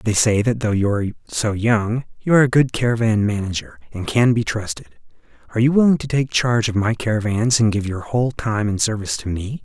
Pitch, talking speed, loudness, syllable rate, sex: 110 Hz, 225 wpm, -19 LUFS, 6.0 syllables/s, male